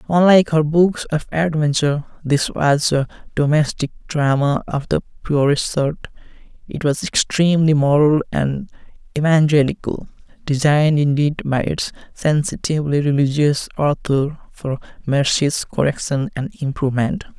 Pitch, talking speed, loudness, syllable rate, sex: 145 Hz, 110 wpm, -18 LUFS, 4.6 syllables/s, male